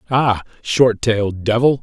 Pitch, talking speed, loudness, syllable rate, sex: 115 Hz, 130 wpm, -17 LUFS, 4.2 syllables/s, male